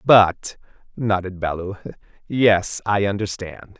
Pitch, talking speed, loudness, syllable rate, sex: 100 Hz, 95 wpm, -20 LUFS, 3.6 syllables/s, male